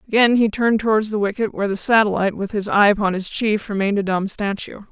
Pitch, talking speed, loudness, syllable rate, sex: 210 Hz, 230 wpm, -19 LUFS, 6.5 syllables/s, female